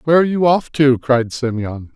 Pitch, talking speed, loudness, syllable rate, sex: 135 Hz, 215 wpm, -16 LUFS, 5.5 syllables/s, male